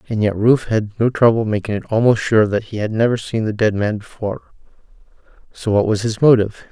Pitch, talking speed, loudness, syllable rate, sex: 110 Hz, 205 wpm, -17 LUFS, 6.0 syllables/s, male